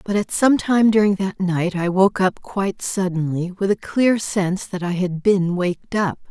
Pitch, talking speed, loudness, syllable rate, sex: 190 Hz, 210 wpm, -20 LUFS, 4.6 syllables/s, female